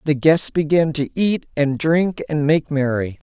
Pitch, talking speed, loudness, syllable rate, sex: 150 Hz, 180 wpm, -19 LUFS, 4.0 syllables/s, male